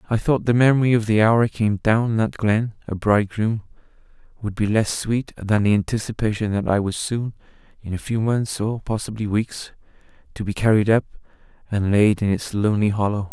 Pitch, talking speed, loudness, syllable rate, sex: 110 Hz, 190 wpm, -21 LUFS, 5.4 syllables/s, male